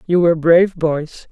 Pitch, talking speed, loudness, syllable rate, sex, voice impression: 165 Hz, 185 wpm, -15 LUFS, 5.1 syllables/s, female, very feminine, slightly young, thin, tensed, weak, slightly dark, slightly soft, clear, fluent, slightly raspy, slightly cute, intellectual, refreshing, sincere, calm, friendly, reassuring, unique, elegant, slightly wild, sweet, lively, slightly strict, slightly intense, sharp, slightly modest, light